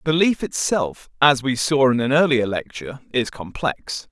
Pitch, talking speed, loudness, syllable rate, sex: 135 Hz, 160 wpm, -20 LUFS, 4.4 syllables/s, male